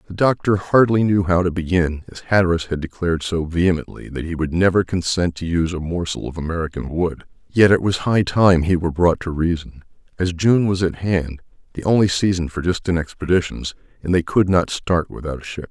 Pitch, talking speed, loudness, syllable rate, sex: 85 Hz, 205 wpm, -19 LUFS, 5.6 syllables/s, male